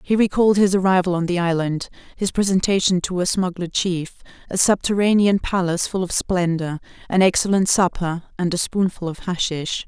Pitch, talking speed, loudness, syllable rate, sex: 185 Hz, 165 wpm, -20 LUFS, 5.4 syllables/s, female